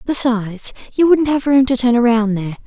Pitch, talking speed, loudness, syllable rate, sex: 245 Hz, 200 wpm, -15 LUFS, 5.2 syllables/s, female